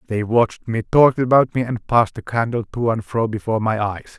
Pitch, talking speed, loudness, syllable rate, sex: 115 Hz, 230 wpm, -19 LUFS, 5.9 syllables/s, male